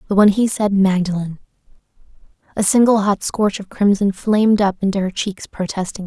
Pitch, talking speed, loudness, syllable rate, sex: 200 Hz, 170 wpm, -17 LUFS, 5.4 syllables/s, female